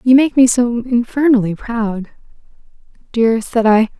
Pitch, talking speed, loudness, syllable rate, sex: 235 Hz, 120 wpm, -15 LUFS, 4.8 syllables/s, female